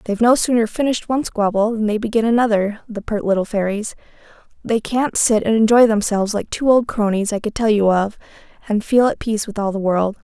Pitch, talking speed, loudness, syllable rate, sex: 220 Hz, 215 wpm, -18 LUFS, 6.0 syllables/s, female